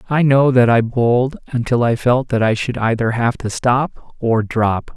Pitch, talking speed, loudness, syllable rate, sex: 120 Hz, 205 wpm, -16 LUFS, 4.3 syllables/s, male